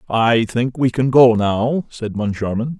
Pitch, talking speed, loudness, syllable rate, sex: 120 Hz, 170 wpm, -17 LUFS, 3.9 syllables/s, male